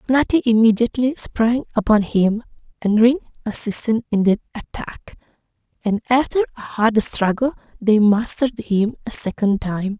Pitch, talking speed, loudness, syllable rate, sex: 225 Hz, 130 wpm, -19 LUFS, 4.7 syllables/s, female